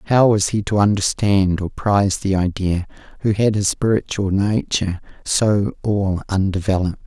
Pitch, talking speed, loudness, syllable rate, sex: 100 Hz, 145 wpm, -19 LUFS, 4.8 syllables/s, male